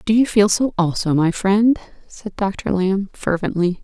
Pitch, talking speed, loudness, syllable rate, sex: 195 Hz, 170 wpm, -18 LUFS, 4.1 syllables/s, female